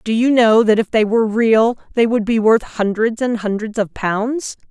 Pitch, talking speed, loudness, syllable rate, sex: 225 Hz, 215 wpm, -16 LUFS, 4.6 syllables/s, female